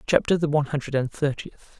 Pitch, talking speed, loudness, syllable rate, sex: 145 Hz, 200 wpm, -24 LUFS, 6.1 syllables/s, male